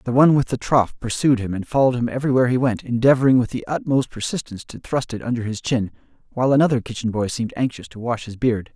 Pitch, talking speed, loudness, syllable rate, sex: 125 Hz, 235 wpm, -20 LUFS, 6.9 syllables/s, male